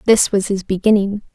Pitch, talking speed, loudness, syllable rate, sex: 200 Hz, 180 wpm, -16 LUFS, 5.4 syllables/s, female